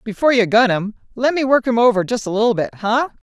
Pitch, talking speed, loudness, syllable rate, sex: 230 Hz, 250 wpm, -17 LUFS, 6.4 syllables/s, female